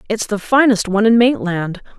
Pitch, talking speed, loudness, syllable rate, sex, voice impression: 210 Hz, 180 wpm, -15 LUFS, 5.4 syllables/s, female, feminine, adult-like, slightly fluent, slightly sweet